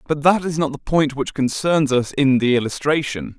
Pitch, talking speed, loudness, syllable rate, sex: 145 Hz, 215 wpm, -19 LUFS, 5.0 syllables/s, male